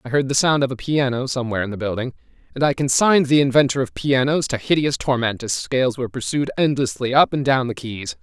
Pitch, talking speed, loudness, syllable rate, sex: 130 Hz, 225 wpm, -19 LUFS, 6.3 syllables/s, male